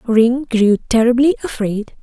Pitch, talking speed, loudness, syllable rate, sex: 235 Hz, 120 wpm, -15 LUFS, 4.1 syllables/s, female